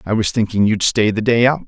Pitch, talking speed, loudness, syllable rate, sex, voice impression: 110 Hz, 285 wpm, -16 LUFS, 6.0 syllables/s, male, masculine, adult-like, thick, cool, sincere, calm, slightly wild